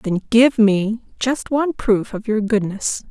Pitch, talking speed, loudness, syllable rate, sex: 220 Hz, 175 wpm, -18 LUFS, 3.8 syllables/s, female